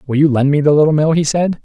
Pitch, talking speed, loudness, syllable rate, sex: 150 Hz, 330 wpm, -13 LUFS, 6.8 syllables/s, male